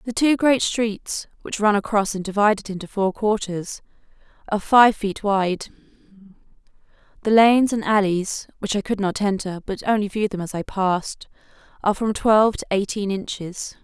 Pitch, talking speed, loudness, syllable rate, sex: 205 Hz, 170 wpm, -21 LUFS, 5.2 syllables/s, female